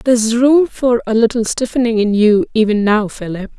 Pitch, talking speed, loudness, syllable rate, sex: 225 Hz, 185 wpm, -14 LUFS, 5.2 syllables/s, female